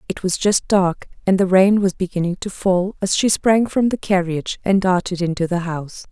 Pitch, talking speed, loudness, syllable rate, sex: 185 Hz, 215 wpm, -18 LUFS, 5.2 syllables/s, female